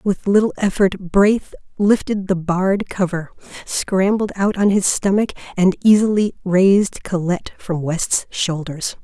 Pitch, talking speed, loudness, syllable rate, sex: 190 Hz, 135 wpm, -18 LUFS, 4.3 syllables/s, female